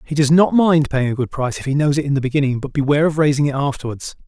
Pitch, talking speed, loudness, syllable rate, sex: 145 Hz, 295 wpm, -17 LUFS, 7.1 syllables/s, male